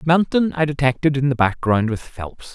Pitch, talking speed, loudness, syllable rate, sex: 135 Hz, 190 wpm, -19 LUFS, 4.9 syllables/s, male